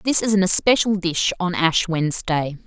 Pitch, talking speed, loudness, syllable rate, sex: 180 Hz, 180 wpm, -19 LUFS, 5.0 syllables/s, female